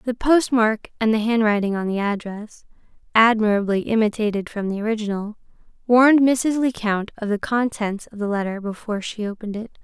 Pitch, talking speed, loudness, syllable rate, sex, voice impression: 220 Hz, 160 wpm, -21 LUFS, 4.2 syllables/s, female, feminine, slightly young, tensed, slightly bright, soft, clear, cute, calm, friendly, reassuring, lively, slightly light